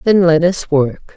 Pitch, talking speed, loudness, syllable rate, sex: 165 Hz, 205 wpm, -14 LUFS, 3.9 syllables/s, female